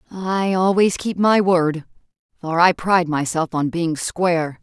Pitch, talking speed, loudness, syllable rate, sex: 175 Hz, 155 wpm, -19 LUFS, 4.2 syllables/s, female